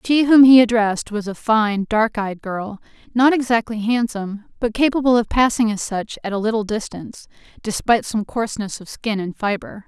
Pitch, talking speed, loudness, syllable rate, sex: 220 Hz, 180 wpm, -19 LUFS, 5.3 syllables/s, female